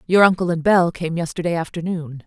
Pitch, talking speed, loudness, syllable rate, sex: 170 Hz, 185 wpm, -19 LUFS, 5.7 syllables/s, female